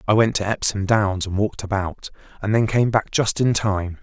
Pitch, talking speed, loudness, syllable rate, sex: 105 Hz, 225 wpm, -21 LUFS, 5.1 syllables/s, male